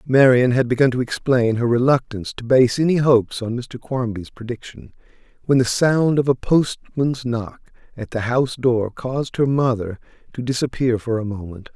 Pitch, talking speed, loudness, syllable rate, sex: 125 Hz, 175 wpm, -19 LUFS, 5.0 syllables/s, male